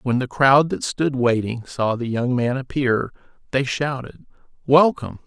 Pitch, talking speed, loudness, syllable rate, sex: 130 Hz, 160 wpm, -20 LUFS, 4.4 syllables/s, male